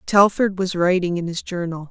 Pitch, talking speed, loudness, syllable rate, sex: 180 Hz, 190 wpm, -20 LUFS, 5.0 syllables/s, female